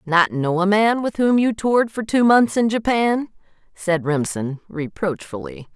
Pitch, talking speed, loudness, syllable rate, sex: 200 Hz, 165 wpm, -19 LUFS, 4.3 syllables/s, female